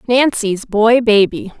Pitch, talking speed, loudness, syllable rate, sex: 220 Hz, 115 wpm, -14 LUFS, 3.6 syllables/s, female